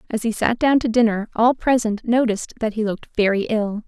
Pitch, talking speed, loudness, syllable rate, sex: 225 Hz, 215 wpm, -20 LUFS, 5.7 syllables/s, female